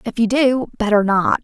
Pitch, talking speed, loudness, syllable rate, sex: 225 Hz, 165 wpm, -17 LUFS, 4.8 syllables/s, female